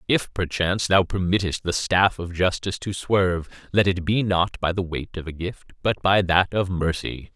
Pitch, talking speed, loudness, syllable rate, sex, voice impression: 90 Hz, 205 wpm, -23 LUFS, 4.8 syllables/s, male, masculine, adult-like, thick, tensed, powerful, clear, fluent, cool, intellectual, calm, friendly, wild, lively, slightly strict